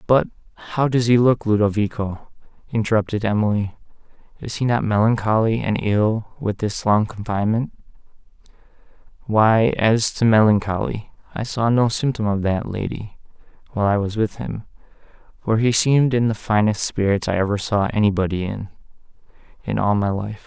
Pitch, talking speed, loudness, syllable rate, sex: 110 Hz, 145 wpm, -20 LUFS, 5.2 syllables/s, male